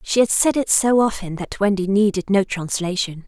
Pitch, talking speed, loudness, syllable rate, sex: 200 Hz, 200 wpm, -19 LUFS, 5.1 syllables/s, female